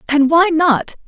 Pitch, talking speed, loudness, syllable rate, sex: 310 Hz, 170 wpm, -14 LUFS, 3.7 syllables/s, female